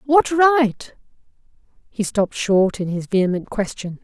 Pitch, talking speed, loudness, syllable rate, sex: 225 Hz, 135 wpm, -19 LUFS, 4.4 syllables/s, female